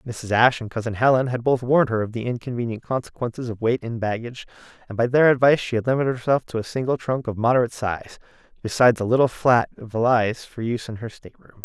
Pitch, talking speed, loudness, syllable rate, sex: 120 Hz, 215 wpm, -22 LUFS, 6.8 syllables/s, male